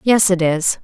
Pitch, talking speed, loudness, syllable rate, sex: 180 Hz, 215 wpm, -15 LUFS, 4.1 syllables/s, female